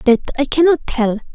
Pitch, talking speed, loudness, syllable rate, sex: 270 Hz, 180 wpm, -16 LUFS, 5.8 syllables/s, female